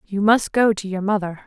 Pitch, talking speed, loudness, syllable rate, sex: 200 Hz, 245 wpm, -19 LUFS, 5.1 syllables/s, female